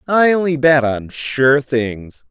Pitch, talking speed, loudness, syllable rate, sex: 140 Hz, 155 wpm, -15 LUFS, 3.3 syllables/s, male